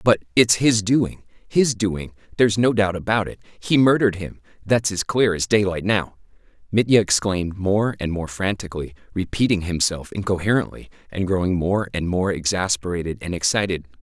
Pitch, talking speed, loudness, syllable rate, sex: 100 Hz, 160 wpm, -21 LUFS, 5.2 syllables/s, male